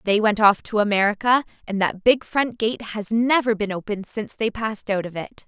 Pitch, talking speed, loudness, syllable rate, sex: 215 Hz, 220 wpm, -21 LUFS, 5.5 syllables/s, female